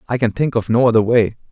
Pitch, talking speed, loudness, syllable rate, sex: 115 Hz, 280 wpm, -16 LUFS, 6.6 syllables/s, male